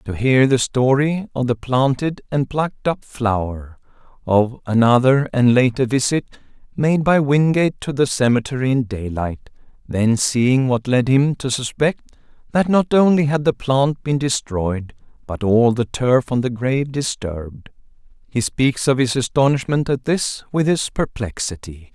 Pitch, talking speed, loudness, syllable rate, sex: 130 Hz, 155 wpm, -18 LUFS, 4.4 syllables/s, male